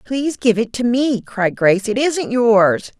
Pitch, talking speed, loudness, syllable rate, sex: 235 Hz, 200 wpm, -17 LUFS, 4.2 syllables/s, female